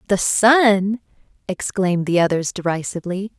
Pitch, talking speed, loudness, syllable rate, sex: 195 Hz, 105 wpm, -18 LUFS, 4.8 syllables/s, female